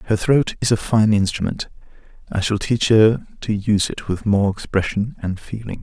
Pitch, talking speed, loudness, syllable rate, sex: 105 Hz, 185 wpm, -19 LUFS, 5.0 syllables/s, male